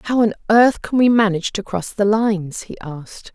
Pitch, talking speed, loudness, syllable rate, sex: 205 Hz, 215 wpm, -17 LUFS, 5.3 syllables/s, female